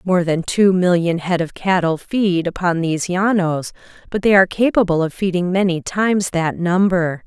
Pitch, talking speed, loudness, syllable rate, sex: 180 Hz, 175 wpm, -17 LUFS, 4.9 syllables/s, female